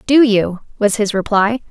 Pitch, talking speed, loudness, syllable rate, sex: 215 Hz, 175 wpm, -15 LUFS, 4.3 syllables/s, female